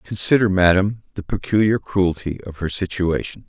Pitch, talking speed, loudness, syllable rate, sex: 95 Hz, 140 wpm, -20 LUFS, 5.0 syllables/s, male